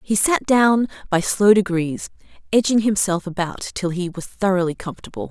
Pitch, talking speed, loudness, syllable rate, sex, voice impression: 195 Hz, 160 wpm, -19 LUFS, 5.1 syllables/s, female, feminine, adult-like, tensed, powerful, fluent, slightly raspy, intellectual, elegant, lively, strict, intense, sharp